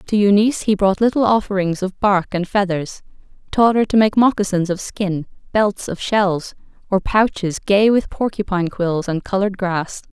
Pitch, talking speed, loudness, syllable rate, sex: 195 Hz, 170 wpm, -18 LUFS, 4.8 syllables/s, female